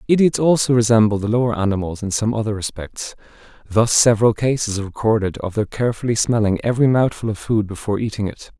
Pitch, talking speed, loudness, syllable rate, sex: 110 Hz, 180 wpm, -18 LUFS, 6.5 syllables/s, male